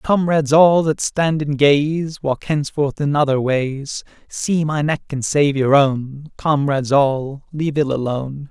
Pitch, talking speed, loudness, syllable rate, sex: 145 Hz, 160 wpm, -18 LUFS, 4.1 syllables/s, male